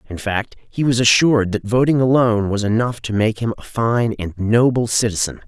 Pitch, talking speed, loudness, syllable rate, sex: 115 Hz, 195 wpm, -17 LUFS, 5.3 syllables/s, male